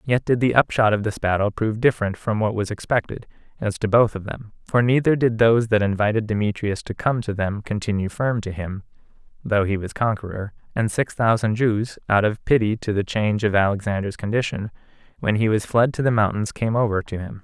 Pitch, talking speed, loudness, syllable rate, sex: 110 Hz, 210 wpm, -21 LUFS, 5.7 syllables/s, male